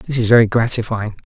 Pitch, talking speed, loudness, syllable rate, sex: 115 Hz, 190 wpm, -16 LUFS, 6.1 syllables/s, male